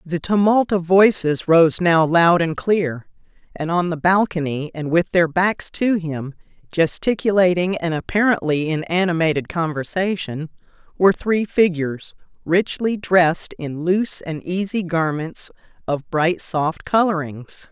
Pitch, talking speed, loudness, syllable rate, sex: 170 Hz, 130 wpm, -19 LUFS, 4.2 syllables/s, female